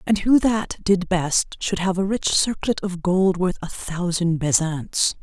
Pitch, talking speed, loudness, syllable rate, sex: 185 Hz, 185 wpm, -21 LUFS, 3.9 syllables/s, female